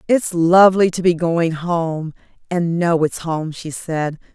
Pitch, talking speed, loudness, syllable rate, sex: 170 Hz, 165 wpm, -18 LUFS, 3.8 syllables/s, female